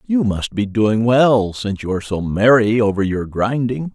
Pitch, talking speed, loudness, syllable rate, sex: 110 Hz, 200 wpm, -17 LUFS, 4.7 syllables/s, male